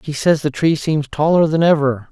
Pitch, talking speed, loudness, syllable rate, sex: 150 Hz, 225 wpm, -16 LUFS, 5.0 syllables/s, male